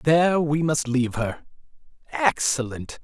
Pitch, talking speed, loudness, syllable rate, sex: 145 Hz, 120 wpm, -23 LUFS, 4.4 syllables/s, male